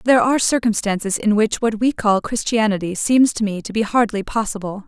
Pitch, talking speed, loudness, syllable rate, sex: 215 Hz, 195 wpm, -18 LUFS, 5.7 syllables/s, female